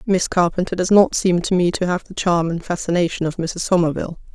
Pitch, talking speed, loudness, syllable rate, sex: 175 Hz, 220 wpm, -19 LUFS, 5.8 syllables/s, female